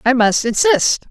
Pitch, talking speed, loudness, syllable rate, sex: 265 Hz, 165 wpm, -14 LUFS, 4.1 syllables/s, female